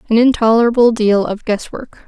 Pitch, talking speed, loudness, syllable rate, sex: 225 Hz, 145 wpm, -14 LUFS, 5.4 syllables/s, female